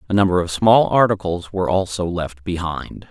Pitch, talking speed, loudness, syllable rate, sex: 90 Hz, 175 wpm, -19 LUFS, 5.1 syllables/s, male